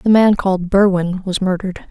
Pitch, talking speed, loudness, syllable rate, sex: 190 Hz, 190 wpm, -16 LUFS, 5.5 syllables/s, female